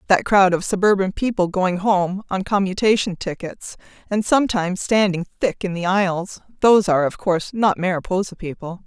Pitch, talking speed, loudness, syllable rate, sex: 190 Hz, 165 wpm, -19 LUFS, 5.5 syllables/s, female